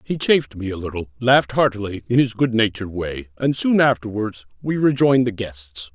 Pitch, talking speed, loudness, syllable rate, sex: 115 Hz, 180 wpm, -20 LUFS, 5.5 syllables/s, male